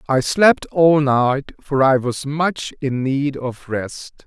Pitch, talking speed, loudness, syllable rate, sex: 140 Hz, 170 wpm, -18 LUFS, 3.2 syllables/s, male